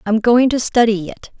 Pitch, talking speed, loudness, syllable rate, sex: 235 Hz, 215 wpm, -15 LUFS, 4.8 syllables/s, female